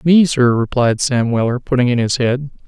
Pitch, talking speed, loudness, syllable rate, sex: 130 Hz, 200 wpm, -15 LUFS, 4.9 syllables/s, male